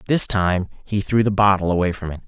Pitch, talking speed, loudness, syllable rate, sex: 95 Hz, 240 wpm, -19 LUFS, 5.8 syllables/s, male